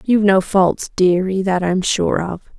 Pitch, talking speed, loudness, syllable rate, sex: 190 Hz, 185 wpm, -17 LUFS, 4.2 syllables/s, female